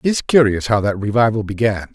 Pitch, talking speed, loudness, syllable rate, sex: 110 Hz, 215 wpm, -17 LUFS, 5.9 syllables/s, male